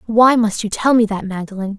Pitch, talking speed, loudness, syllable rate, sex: 215 Hz, 235 wpm, -16 LUFS, 5.5 syllables/s, female